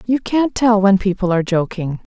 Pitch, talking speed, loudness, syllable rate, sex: 205 Hz, 195 wpm, -17 LUFS, 5.2 syllables/s, female